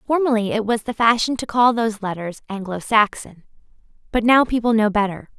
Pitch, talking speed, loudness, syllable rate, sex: 220 Hz, 180 wpm, -19 LUFS, 5.6 syllables/s, female